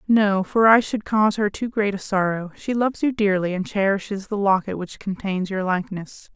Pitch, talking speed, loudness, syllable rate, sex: 200 Hz, 210 wpm, -21 LUFS, 5.2 syllables/s, female